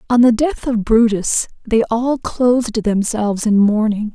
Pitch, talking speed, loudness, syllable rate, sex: 225 Hz, 160 wpm, -16 LUFS, 4.2 syllables/s, female